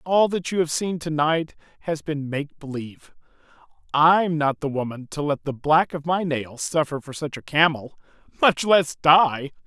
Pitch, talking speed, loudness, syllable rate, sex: 150 Hz, 185 wpm, -22 LUFS, 4.4 syllables/s, male